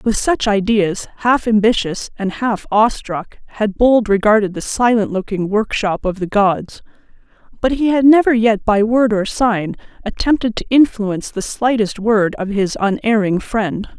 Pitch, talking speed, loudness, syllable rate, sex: 215 Hz, 165 wpm, -16 LUFS, 4.4 syllables/s, female